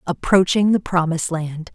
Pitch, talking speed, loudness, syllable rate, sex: 175 Hz, 140 wpm, -18 LUFS, 5.0 syllables/s, female